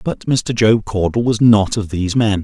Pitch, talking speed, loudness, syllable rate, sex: 110 Hz, 220 wpm, -15 LUFS, 4.7 syllables/s, male